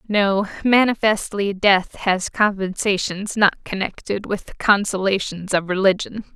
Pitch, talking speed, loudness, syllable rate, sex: 200 Hz, 105 wpm, -20 LUFS, 4.3 syllables/s, female